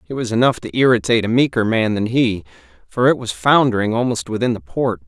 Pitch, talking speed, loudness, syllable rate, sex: 110 Hz, 215 wpm, -17 LUFS, 6.1 syllables/s, male